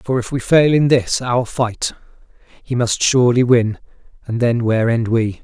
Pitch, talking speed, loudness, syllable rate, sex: 120 Hz, 190 wpm, -16 LUFS, 4.7 syllables/s, male